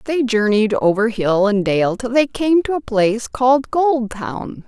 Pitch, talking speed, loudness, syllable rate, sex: 235 Hz, 180 wpm, -17 LUFS, 4.3 syllables/s, female